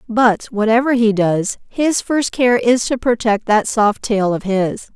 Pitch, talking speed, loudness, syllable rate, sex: 225 Hz, 180 wpm, -16 LUFS, 3.9 syllables/s, female